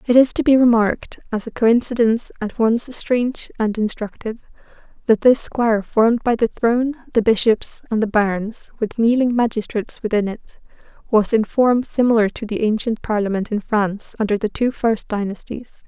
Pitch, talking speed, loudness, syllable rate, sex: 225 Hz, 170 wpm, -19 LUFS, 5.3 syllables/s, female